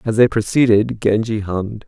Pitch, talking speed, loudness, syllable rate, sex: 110 Hz, 160 wpm, -17 LUFS, 5.1 syllables/s, male